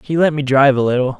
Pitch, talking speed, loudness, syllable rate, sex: 135 Hz, 300 wpm, -14 LUFS, 7.3 syllables/s, male